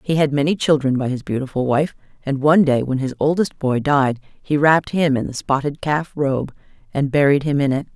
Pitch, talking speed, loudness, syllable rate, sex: 140 Hz, 220 wpm, -19 LUFS, 5.4 syllables/s, female